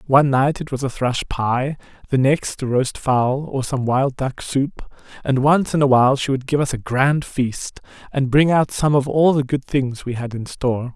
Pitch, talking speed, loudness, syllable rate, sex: 135 Hz, 230 wpm, -19 LUFS, 4.6 syllables/s, male